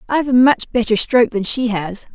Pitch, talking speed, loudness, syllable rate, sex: 230 Hz, 225 wpm, -16 LUFS, 5.8 syllables/s, female